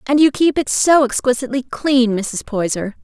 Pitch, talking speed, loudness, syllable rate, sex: 255 Hz, 180 wpm, -16 LUFS, 4.9 syllables/s, female